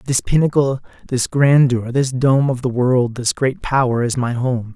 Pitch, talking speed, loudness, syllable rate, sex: 130 Hz, 190 wpm, -17 LUFS, 4.3 syllables/s, male